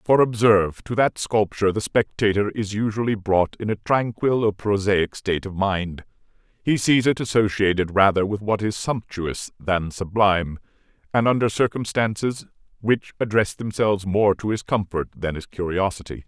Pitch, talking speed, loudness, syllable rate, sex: 105 Hz, 155 wpm, -22 LUFS, 4.9 syllables/s, male